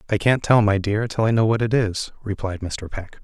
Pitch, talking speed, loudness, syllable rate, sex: 105 Hz, 260 wpm, -21 LUFS, 5.2 syllables/s, male